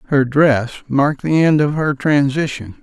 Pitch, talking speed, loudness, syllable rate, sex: 140 Hz, 170 wpm, -16 LUFS, 4.6 syllables/s, male